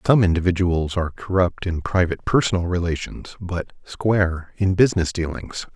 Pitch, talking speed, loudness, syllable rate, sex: 90 Hz, 135 wpm, -21 LUFS, 5.2 syllables/s, male